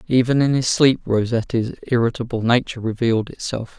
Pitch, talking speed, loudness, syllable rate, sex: 120 Hz, 145 wpm, -20 LUFS, 5.6 syllables/s, male